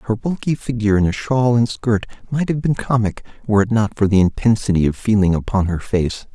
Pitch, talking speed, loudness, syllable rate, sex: 110 Hz, 220 wpm, -18 LUFS, 5.7 syllables/s, male